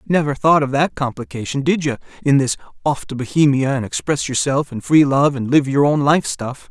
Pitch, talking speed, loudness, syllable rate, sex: 140 Hz, 215 wpm, -18 LUFS, 5.4 syllables/s, male